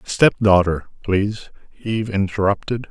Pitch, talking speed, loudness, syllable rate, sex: 100 Hz, 85 wpm, -19 LUFS, 4.9 syllables/s, male